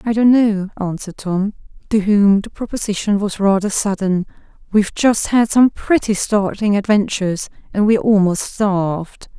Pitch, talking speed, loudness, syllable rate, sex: 205 Hz, 145 wpm, -17 LUFS, 4.8 syllables/s, female